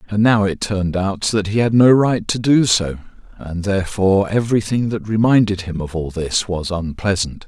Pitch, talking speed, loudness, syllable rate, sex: 100 Hz, 195 wpm, -17 LUFS, 5.1 syllables/s, male